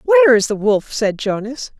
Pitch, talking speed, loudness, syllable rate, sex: 245 Hz, 200 wpm, -16 LUFS, 6.6 syllables/s, female